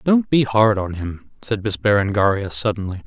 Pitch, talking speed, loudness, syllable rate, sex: 105 Hz, 175 wpm, -19 LUFS, 5.0 syllables/s, male